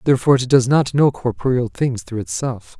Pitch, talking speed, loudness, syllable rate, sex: 130 Hz, 195 wpm, -18 LUFS, 5.7 syllables/s, male